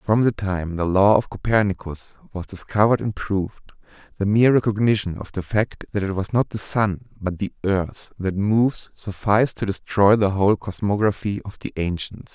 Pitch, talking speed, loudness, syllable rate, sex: 100 Hz, 180 wpm, -21 LUFS, 5.2 syllables/s, male